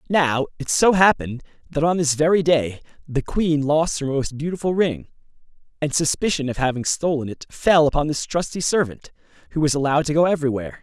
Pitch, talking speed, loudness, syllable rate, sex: 150 Hz, 185 wpm, -20 LUFS, 5.8 syllables/s, male